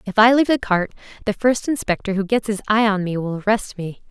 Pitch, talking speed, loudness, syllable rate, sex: 210 Hz, 250 wpm, -19 LUFS, 6.1 syllables/s, female